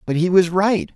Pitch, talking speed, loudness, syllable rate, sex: 175 Hz, 250 wpm, -17 LUFS, 4.9 syllables/s, male